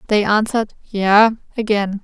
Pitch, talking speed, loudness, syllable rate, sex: 210 Hz, 120 wpm, -17 LUFS, 6.1 syllables/s, female